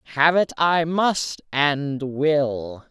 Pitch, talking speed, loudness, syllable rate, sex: 145 Hz, 125 wpm, -21 LUFS, 2.5 syllables/s, male